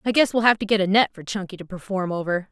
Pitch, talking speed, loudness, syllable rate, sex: 195 Hz, 310 wpm, -21 LUFS, 6.8 syllables/s, female